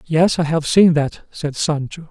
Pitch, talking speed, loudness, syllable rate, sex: 155 Hz, 200 wpm, -17 LUFS, 4.2 syllables/s, male